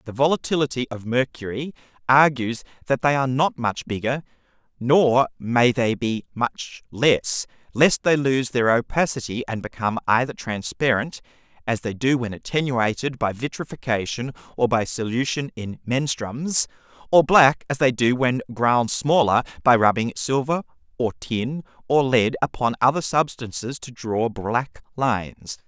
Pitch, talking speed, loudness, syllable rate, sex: 125 Hz, 140 wpm, -22 LUFS, 4.5 syllables/s, male